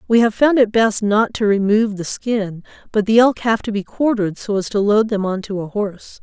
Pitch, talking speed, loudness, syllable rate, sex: 210 Hz, 250 wpm, -17 LUFS, 5.4 syllables/s, female